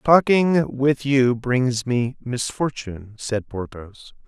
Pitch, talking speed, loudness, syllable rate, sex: 125 Hz, 110 wpm, -21 LUFS, 3.2 syllables/s, male